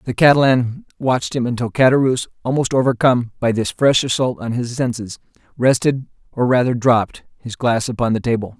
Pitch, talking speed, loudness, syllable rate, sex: 125 Hz, 170 wpm, -17 LUFS, 5.7 syllables/s, male